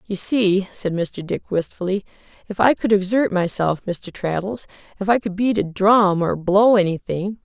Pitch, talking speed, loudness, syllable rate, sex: 195 Hz, 160 wpm, -20 LUFS, 4.4 syllables/s, female